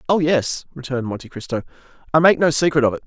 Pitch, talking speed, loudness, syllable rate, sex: 145 Hz, 215 wpm, -19 LUFS, 7.1 syllables/s, male